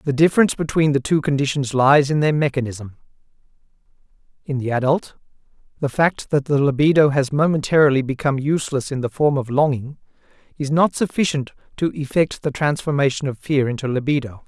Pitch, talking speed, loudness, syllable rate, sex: 140 Hz, 160 wpm, -19 LUFS, 5.8 syllables/s, male